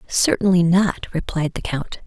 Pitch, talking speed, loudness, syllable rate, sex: 180 Hz, 145 wpm, -20 LUFS, 4.3 syllables/s, female